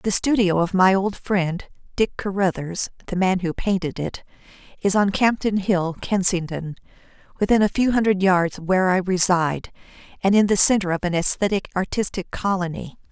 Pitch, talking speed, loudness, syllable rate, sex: 190 Hz, 165 wpm, -21 LUFS, 5.1 syllables/s, female